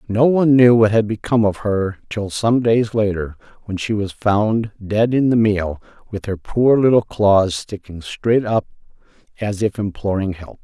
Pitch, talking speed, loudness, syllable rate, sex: 105 Hz, 180 wpm, -17 LUFS, 4.5 syllables/s, male